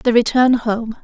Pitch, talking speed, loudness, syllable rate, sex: 235 Hz, 175 wpm, -16 LUFS, 4.1 syllables/s, female